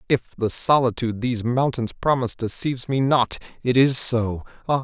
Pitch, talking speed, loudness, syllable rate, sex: 125 Hz, 160 wpm, -21 LUFS, 5.5 syllables/s, male